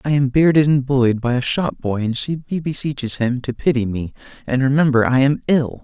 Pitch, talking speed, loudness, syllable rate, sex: 130 Hz, 215 wpm, -18 LUFS, 5.2 syllables/s, male